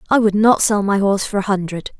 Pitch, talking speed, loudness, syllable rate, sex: 200 Hz, 270 wpm, -16 LUFS, 6.2 syllables/s, female